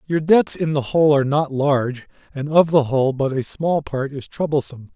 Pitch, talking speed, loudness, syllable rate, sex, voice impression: 140 Hz, 220 wpm, -19 LUFS, 5.6 syllables/s, male, very masculine, very middle-aged, thick, slightly relaxed, powerful, bright, soft, slightly muffled, fluent, slightly raspy, slightly cool, intellectual, slightly refreshing, sincere, very calm, very mature, friendly, reassuring, unique, slightly elegant, wild, slightly sweet, lively, kind